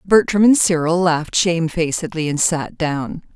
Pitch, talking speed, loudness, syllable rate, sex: 170 Hz, 145 wpm, -17 LUFS, 4.7 syllables/s, female